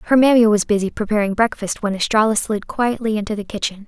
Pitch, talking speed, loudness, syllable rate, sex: 215 Hz, 200 wpm, -18 LUFS, 6.0 syllables/s, female